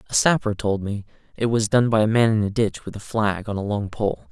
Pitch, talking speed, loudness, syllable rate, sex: 105 Hz, 280 wpm, -22 LUFS, 5.5 syllables/s, male